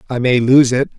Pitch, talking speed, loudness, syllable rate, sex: 125 Hz, 245 wpm, -13 LUFS, 5.5 syllables/s, male